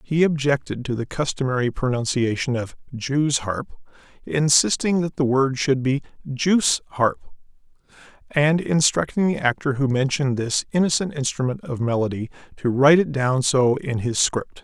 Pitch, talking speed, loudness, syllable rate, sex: 135 Hz, 150 wpm, -21 LUFS, 4.9 syllables/s, male